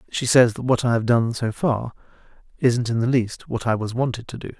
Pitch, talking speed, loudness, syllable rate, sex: 120 Hz, 235 wpm, -21 LUFS, 5.2 syllables/s, male